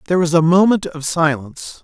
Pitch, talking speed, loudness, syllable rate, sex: 165 Hz, 195 wpm, -16 LUFS, 6.1 syllables/s, male